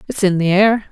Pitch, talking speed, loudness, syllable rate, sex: 200 Hz, 260 wpm, -15 LUFS, 5.7 syllables/s, female